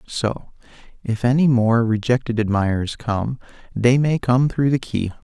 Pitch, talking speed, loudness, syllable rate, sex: 120 Hz, 145 wpm, -20 LUFS, 4.7 syllables/s, male